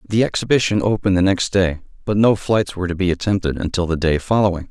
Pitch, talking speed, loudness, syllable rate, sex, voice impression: 95 Hz, 215 wpm, -18 LUFS, 6.4 syllables/s, male, very masculine, adult-like, slightly middle-aged, very thick, tensed, powerful, slightly dark, hard, clear, very fluent, very cool, very intellectual, slightly refreshing, very sincere, very calm, mature, friendly, reassuring, slightly unique, elegant, slightly wild, sweet, kind, slightly modest